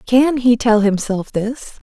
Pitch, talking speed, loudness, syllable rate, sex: 230 Hz, 160 wpm, -16 LUFS, 3.6 syllables/s, female